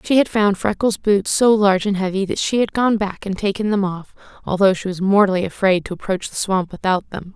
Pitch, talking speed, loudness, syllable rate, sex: 195 Hz, 235 wpm, -18 LUFS, 5.6 syllables/s, female